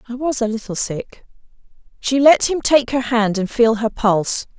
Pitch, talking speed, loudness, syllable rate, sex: 235 Hz, 195 wpm, -17 LUFS, 4.8 syllables/s, female